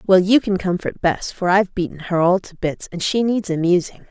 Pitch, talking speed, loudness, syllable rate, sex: 185 Hz, 235 wpm, -19 LUFS, 5.3 syllables/s, female